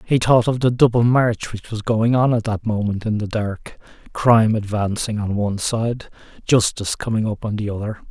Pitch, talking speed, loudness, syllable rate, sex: 110 Hz, 195 wpm, -19 LUFS, 5.1 syllables/s, male